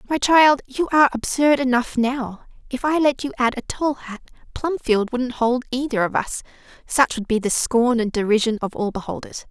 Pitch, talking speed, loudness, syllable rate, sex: 250 Hz, 195 wpm, -20 LUFS, 5.0 syllables/s, female